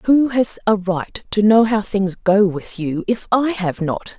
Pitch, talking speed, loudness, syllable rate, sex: 205 Hz, 215 wpm, -18 LUFS, 3.9 syllables/s, female